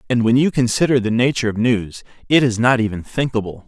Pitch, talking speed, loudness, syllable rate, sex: 120 Hz, 210 wpm, -17 LUFS, 6.2 syllables/s, male